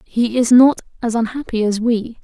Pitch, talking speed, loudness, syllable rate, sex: 235 Hz, 190 wpm, -16 LUFS, 4.7 syllables/s, female